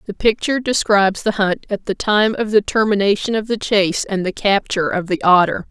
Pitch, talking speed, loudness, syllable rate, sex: 205 Hz, 210 wpm, -17 LUFS, 5.7 syllables/s, female